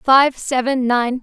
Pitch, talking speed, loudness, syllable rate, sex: 255 Hz, 145 wpm, -17 LUFS, 3.4 syllables/s, female